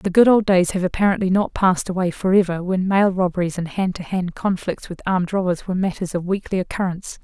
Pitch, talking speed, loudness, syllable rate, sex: 185 Hz, 225 wpm, -20 LUFS, 6.2 syllables/s, female